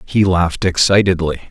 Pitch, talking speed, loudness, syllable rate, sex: 90 Hz, 120 wpm, -14 LUFS, 5.5 syllables/s, male